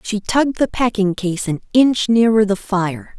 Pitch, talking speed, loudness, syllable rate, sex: 210 Hz, 190 wpm, -17 LUFS, 4.4 syllables/s, female